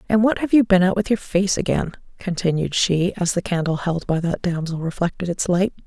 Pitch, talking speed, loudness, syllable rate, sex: 180 Hz, 225 wpm, -20 LUFS, 5.4 syllables/s, female